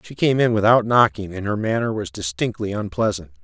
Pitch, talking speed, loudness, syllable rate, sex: 110 Hz, 190 wpm, -20 LUFS, 5.6 syllables/s, male